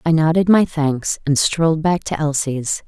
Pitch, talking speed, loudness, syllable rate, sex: 155 Hz, 190 wpm, -17 LUFS, 4.4 syllables/s, female